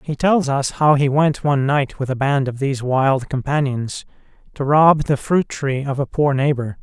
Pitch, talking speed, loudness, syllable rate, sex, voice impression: 140 Hz, 210 wpm, -18 LUFS, 4.7 syllables/s, male, masculine, very adult-like, cool, sincere, slightly calm, reassuring